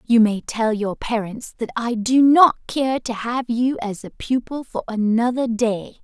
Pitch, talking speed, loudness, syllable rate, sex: 235 Hz, 190 wpm, -20 LUFS, 4.1 syllables/s, female